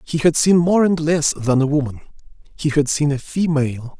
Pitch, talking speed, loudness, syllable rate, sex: 150 Hz, 210 wpm, -18 LUFS, 5.1 syllables/s, male